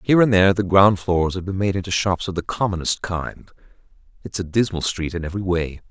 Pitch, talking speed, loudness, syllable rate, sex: 95 Hz, 225 wpm, -20 LUFS, 6.0 syllables/s, male